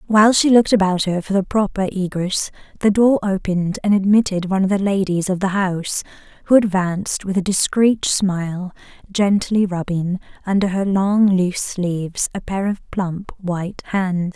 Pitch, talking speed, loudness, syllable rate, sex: 190 Hz, 165 wpm, -18 LUFS, 4.9 syllables/s, female